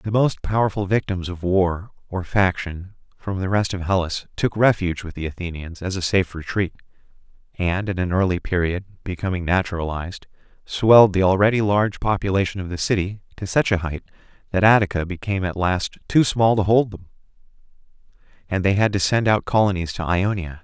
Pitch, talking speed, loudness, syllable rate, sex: 95 Hz, 175 wpm, -21 LUFS, 5.6 syllables/s, male